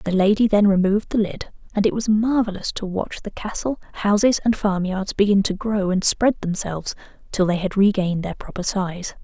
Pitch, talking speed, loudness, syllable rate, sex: 200 Hz, 195 wpm, -21 LUFS, 5.5 syllables/s, female